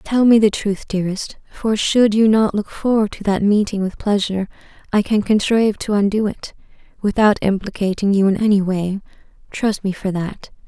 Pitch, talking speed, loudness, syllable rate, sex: 205 Hz, 180 wpm, -18 LUFS, 5.1 syllables/s, female